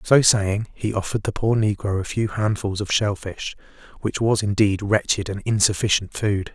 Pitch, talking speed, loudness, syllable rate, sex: 105 Hz, 185 wpm, -22 LUFS, 4.9 syllables/s, male